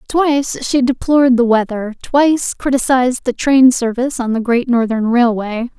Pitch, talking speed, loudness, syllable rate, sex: 250 Hz, 155 wpm, -14 LUFS, 5.0 syllables/s, female